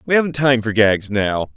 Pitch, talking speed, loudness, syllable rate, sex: 115 Hz, 230 wpm, -17 LUFS, 4.9 syllables/s, male